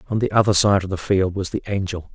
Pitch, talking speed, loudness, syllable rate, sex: 95 Hz, 280 wpm, -20 LUFS, 6.3 syllables/s, male